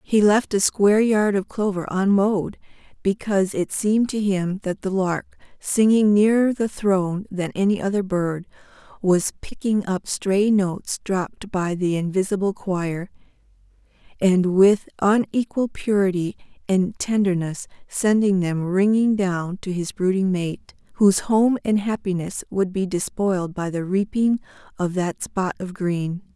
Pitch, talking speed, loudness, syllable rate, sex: 195 Hz, 145 wpm, -21 LUFS, 4.4 syllables/s, female